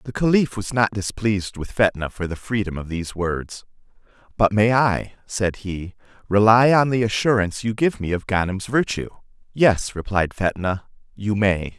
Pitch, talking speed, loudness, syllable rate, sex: 105 Hz, 170 wpm, -21 LUFS, 4.7 syllables/s, male